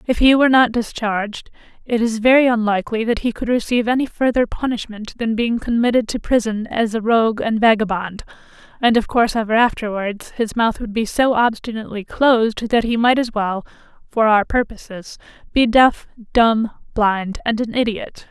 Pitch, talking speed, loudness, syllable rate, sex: 225 Hz, 175 wpm, -18 LUFS, 5.2 syllables/s, female